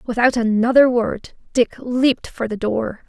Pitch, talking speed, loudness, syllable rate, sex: 235 Hz, 155 wpm, -18 LUFS, 4.3 syllables/s, female